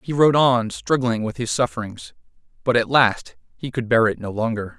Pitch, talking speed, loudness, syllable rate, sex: 120 Hz, 200 wpm, -20 LUFS, 5.0 syllables/s, male